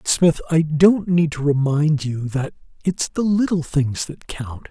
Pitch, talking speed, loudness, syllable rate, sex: 155 Hz, 180 wpm, -19 LUFS, 3.8 syllables/s, male